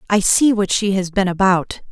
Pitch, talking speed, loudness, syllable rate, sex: 195 Hz, 220 wpm, -16 LUFS, 4.8 syllables/s, female